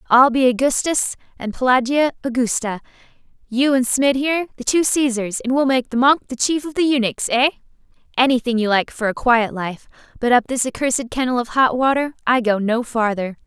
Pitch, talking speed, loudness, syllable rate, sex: 250 Hz, 185 wpm, -18 LUFS, 5.4 syllables/s, female